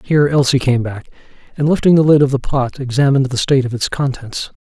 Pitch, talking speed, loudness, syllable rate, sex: 135 Hz, 220 wpm, -15 LUFS, 6.3 syllables/s, male